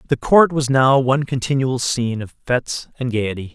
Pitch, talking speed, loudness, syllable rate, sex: 130 Hz, 185 wpm, -18 LUFS, 5.4 syllables/s, male